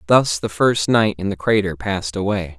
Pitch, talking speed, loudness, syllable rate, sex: 100 Hz, 210 wpm, -19 LUFS, 5.0 syllables/s, male